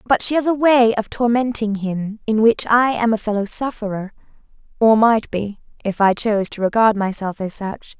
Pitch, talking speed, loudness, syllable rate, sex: 220 Hz, 195 wpm, -18 LUFS, 4.9 syllables/s, female